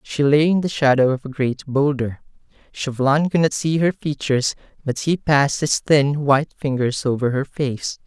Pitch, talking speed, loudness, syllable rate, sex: 140 Hz, 185 wpm, -19 LUFS, 5.0 syllables/s, male